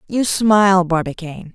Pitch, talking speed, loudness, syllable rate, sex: 185 Hz, 115 wpm, -15 LUFS, 5.1 syllables/s, female